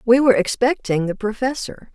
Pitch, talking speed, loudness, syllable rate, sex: 230 Hz, 155 wpm, -19 LUFS, 5.4 syllables/s, female